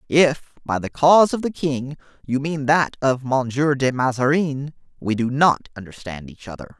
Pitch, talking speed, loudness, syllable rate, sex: 135 Hz, 175 wpm, -20 LUFS, 4.7 syllables/s, male